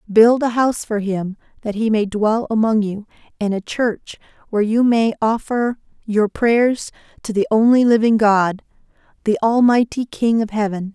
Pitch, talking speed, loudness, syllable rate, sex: 220 Hz, 165 wpm, -17 LUFS, 4.6 syllables/s, female